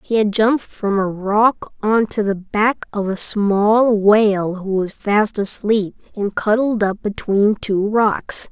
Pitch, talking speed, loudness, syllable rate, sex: 210 Hz, 160 wpm, -17 LUFS, 3.6 syllables/s, female